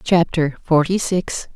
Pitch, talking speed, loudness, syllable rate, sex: 165 Hz, 115 wpm, -19 LUFS, 3.6 syllables/s, female